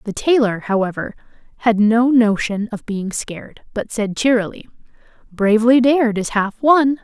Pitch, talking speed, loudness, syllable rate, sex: 225 Hz, 145 wpm, -17 LUFS, 4.8 syllables/s, female